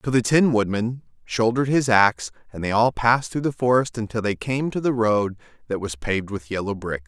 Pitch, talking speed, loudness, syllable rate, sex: 115 Hz, 220 wpm, -22 LUFS, 5.6 syllables/s, male